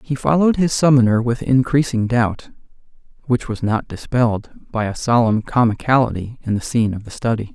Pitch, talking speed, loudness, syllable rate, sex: 120 Hz, 165 wpm, -18 LUFS, 5.4 syllables/s, male